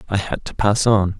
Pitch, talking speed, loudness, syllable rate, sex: 100 Hz, 250 wpm, -19 LUFS, 5.1 syllables/s, male